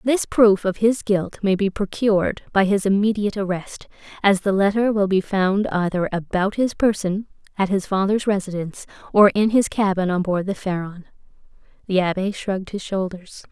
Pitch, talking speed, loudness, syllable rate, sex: 195 Hz, 175 wpm, -20 LUFS, 5.1 syllables/s, female